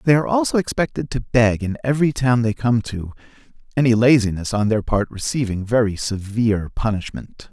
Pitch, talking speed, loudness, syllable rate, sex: 115 Hz, 170 wpm, -19 LUFS, 5.5 syllables/s, male